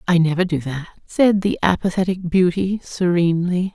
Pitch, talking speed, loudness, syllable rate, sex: 180 Hz, 145 wpm, -19 LUFS, 5.1 syllables/s, female